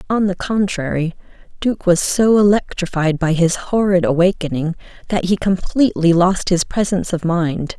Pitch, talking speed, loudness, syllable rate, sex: 180 Hz, 145 wpm, -17 LUFS, 4.9 syllables/s, female